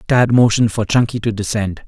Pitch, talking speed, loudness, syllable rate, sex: 110 Hz, 190 wpm, -16 LUFS, 6.0 syllables/s, male